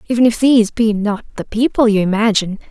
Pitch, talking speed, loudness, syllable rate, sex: 220 Hz, 200 wpm, -15 LUFS, 6.5 syllables/s, female